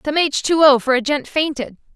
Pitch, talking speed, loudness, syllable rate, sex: 280 Hz, 245 wpm, -16 LUFS, 5.4 syllables/s, female